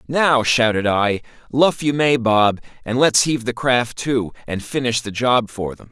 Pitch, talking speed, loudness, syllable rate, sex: 120 Hz, 195 wpm, -18 LUFS, 4.4 syllables/s, male